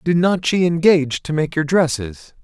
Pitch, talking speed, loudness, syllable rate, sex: 155 Hz, 195 wpm, -17 LUFS, 4.8 syllables/s, male